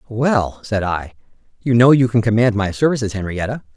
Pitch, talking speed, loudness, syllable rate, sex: 110 Hz, 175 wpm, -17 LUFS, 5.4 syllables/s, male